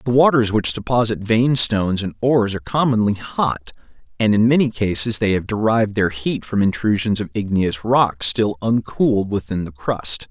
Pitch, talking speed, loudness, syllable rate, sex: 110 Hz, 175 wpm, -18 LUFS, 4.9 syllables/s, male